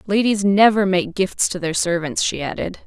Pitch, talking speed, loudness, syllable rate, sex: 190 Hz, 190 wpm, -19 LUFS, 4.8 syllables/s, female